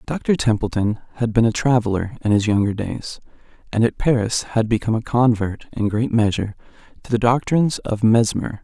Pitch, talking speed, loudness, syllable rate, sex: 110 Hz, 175 wpm, -20 LUFS, 5.5 syllables/s, male